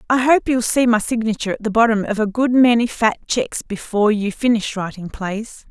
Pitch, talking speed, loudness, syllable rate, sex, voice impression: 225 Hz, 210 wpm, -18 LUFS, 5.9 syllables/s, female, very feminine, adult-like, middle-aged, slightly thin, tensed, very powerful, slightly bright, hard, very clear, fluent, cool, very intellectual, refreshing, very sincere, slightly calm, slightly friendly, reassuring, unique, elegant, slightly wild, slightly sweet, lively, slightly strict, slightly intense